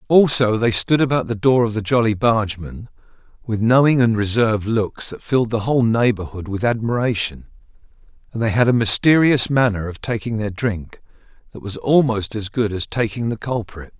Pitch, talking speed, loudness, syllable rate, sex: 110 Hz, 175 wpm, -19 LUFS, 5.3 syllables/s, male